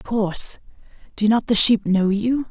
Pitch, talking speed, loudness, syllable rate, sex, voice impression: 215 Hz, 190 wpm, -19 LUFS, 4.7 syllables/s, female, feminine, adult-like, tensed, slightly dark, fluent, intellectual, elegant, slightly strict, slightly sharp